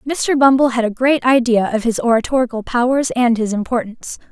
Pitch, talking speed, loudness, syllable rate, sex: 245 Hz, 180 wpm, -16 LUFS, 5.8 syllables/s, female